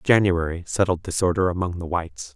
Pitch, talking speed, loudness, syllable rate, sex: 90 Hz, 155 wpm, -23 LUFS, 5.7 syllables/s, male